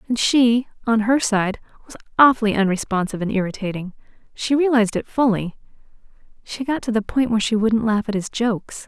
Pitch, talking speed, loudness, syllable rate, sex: 220 Hz, 160 wpm, -20 LUFS, 5.9 syllables/s, female